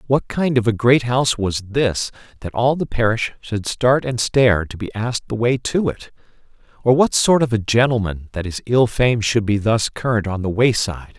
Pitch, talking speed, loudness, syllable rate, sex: 115 Hz, 215 wpm, -18 LUFS, 5.0 syllables/s, male